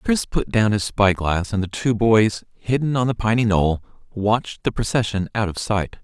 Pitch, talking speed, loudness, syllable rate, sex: 105 Hz, 200 wpm, -20 LUFS, 4.8 syllables/s, male